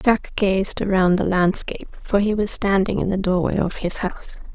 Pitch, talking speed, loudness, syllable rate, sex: 190 Hz, 200 wpm, -20 LUFS, 5.0 syllables/s, female